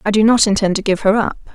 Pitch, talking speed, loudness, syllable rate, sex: 205 Hz, 310 wpm, -15 LUFS, 6.9 syllables/s, female